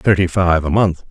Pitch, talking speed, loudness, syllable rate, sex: 90 Hz, 220 wpm, -15 LUFS, 4.8 syllables/s, male